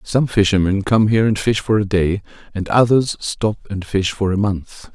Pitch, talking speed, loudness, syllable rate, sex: 100 Hz, 205 wpm, -18 LUFS, 4.7 syllables/s, male